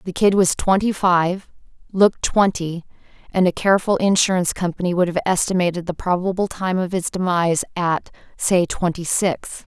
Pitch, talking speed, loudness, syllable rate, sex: 180 Hz, 155 wpm, -19 LUFS, 5.2 syllables/s, female